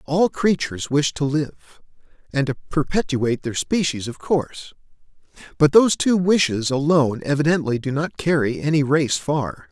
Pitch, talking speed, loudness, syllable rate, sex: 145 Hz, 150 wpm, -20 LUFS, 5.1 syllables/s, male